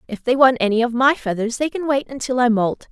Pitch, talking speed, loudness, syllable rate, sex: 245 Hz, 270 wpm, -18 LUFS, 5.9 syllables/s, female